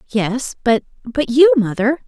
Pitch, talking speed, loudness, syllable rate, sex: 250 Hz, 85 wpm, -16 LUFS, 4.1 syllables/s, female